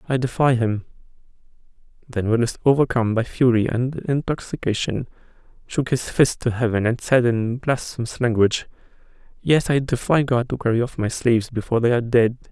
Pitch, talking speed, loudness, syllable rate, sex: 120 Hz, 160 wpm, -21 LUFS, 5.6 syllables/s, male